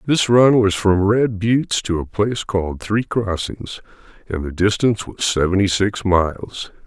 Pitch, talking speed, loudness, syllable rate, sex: 100 Hz, 165 wpm, -18 LUFS, 4.6 syllables/s, male